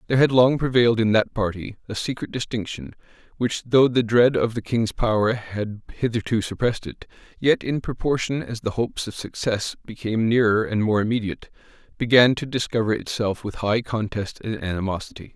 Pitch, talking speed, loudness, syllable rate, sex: 115 Hz, 170 wpm, -22 LUFS, 5.5 syllables/s, male